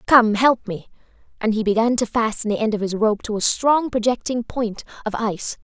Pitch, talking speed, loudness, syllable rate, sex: 225 Hz, 210 wpm, -20 LUFS, 5.3 syllables/s, female